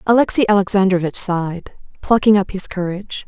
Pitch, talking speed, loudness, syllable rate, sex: 195 Hz, 130 wpm, -17 LUFS, 5.8 syllables/s, female